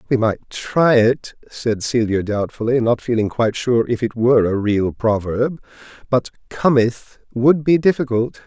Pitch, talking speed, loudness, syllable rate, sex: 120 Hz, 155 wpm, -18 LUFS, 4.4 syllables/s, male